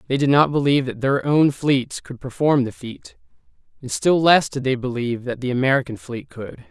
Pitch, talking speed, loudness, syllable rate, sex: 135 Hz, 205 wpm, -20 LUFS, 5.3 syllables/s, male